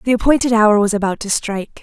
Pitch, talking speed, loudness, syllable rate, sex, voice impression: 220 Hz, 230 wpm, -15 LUFS, 6.4 syllables/s, female, feminine, adult-like, slightly thin, slightly tensed, powerful, bright, soft, raspy, intellectual, friendly, elegant, lively